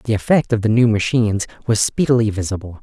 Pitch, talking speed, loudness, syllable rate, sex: 110 Hz, 190 wpm, -17 LUFS, 6.4 syllables/s, male